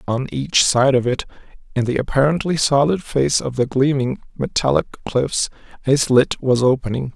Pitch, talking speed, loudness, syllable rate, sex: 130 Hz, 160 wpm, -18 LUFS, 4.6 syllables/s, male